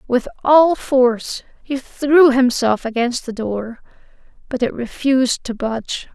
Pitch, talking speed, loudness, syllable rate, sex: 250 Hz, 135 wpm, -17 LUFS, 4.0 syllables/s, female